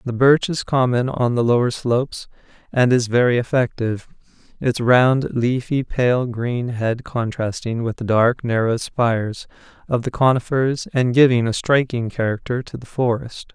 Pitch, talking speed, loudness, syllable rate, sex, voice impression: 125 Hz, 155 wpm, -19 LUFS, 4.5 syllables/s, male, masculine, adult-like, slightly weak, slightly dark, calm, modest